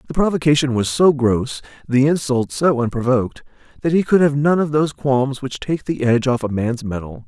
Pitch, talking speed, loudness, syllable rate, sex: 135 Hz, 205 wpm, -18 LUFS, 5.4 syllables/s, male